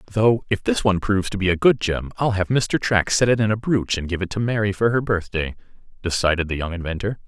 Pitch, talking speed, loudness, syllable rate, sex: 100 Hz, 255 wpm, -21 LUFS, 6.2 syllables/s, male